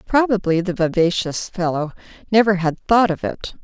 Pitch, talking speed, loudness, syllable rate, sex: 190 Hz, 150 wpm, -19 LUFS, 4.9 syllables/s, female